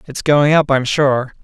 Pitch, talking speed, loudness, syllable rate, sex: 140 Hz, 210 wpm, -14 LUFS, 4.1 syllables/s, male